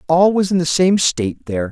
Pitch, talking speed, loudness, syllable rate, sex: 165 Hz, 245 wpm, -16 LUFS, 5.9 syllables/s, male